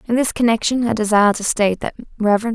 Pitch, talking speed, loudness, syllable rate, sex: 225 Hz, 210 wpm, -17 LUFS, 6.8 syllables/s, female